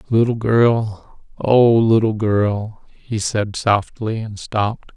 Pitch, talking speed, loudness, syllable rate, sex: 110 Hz, 110 wpm, -18 LUFS, 3.1 syllables/s, male